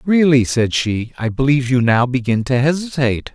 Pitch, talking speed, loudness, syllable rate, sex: 130 Hz, 180 wpm, -16 LUFS, 5.4 syllables/s, male